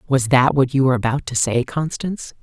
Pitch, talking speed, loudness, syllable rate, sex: 130 Hz, 225 wpm, -18 LUFS, 5.9 syllables/s, female